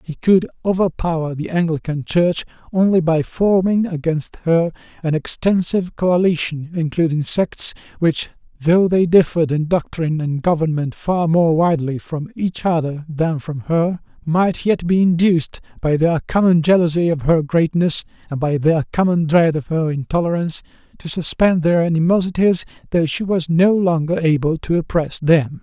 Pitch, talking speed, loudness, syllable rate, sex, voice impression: 165 Hz, 150 wpm, -18 LUFS, 4.8 syllables/s, male, masculine, middle-aged, slightly powerful, slightly halting, intellectual, calm, mature, wild, lively, strict, sharp